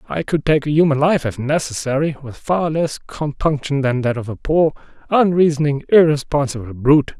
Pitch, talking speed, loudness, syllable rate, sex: 145 Hz, 165 wpm, -18 LUFS, 5.3 syllables/s, male